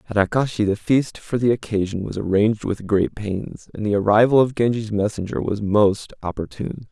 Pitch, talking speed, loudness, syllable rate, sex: 110 Hz, 180 wpm, -21 LUFS, 5.4 syllables/s, male